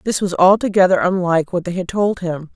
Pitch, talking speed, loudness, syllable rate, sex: 185 Hz, 210 wpm, -16 LUFS, 5.8 syllables/s, female